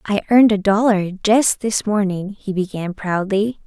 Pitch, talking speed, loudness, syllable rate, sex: 205 Hz, 165 wpm, -18 LUFS, 4.5 syllables/s, female